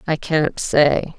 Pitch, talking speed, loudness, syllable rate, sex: 150 Hz, 150 wpm, -18 LUFS, 2.9 syllables/s, female